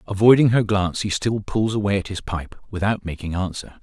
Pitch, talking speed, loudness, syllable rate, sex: 100 Hz, 205 wpm, -21 LUFS, 5.7 syllables/s, male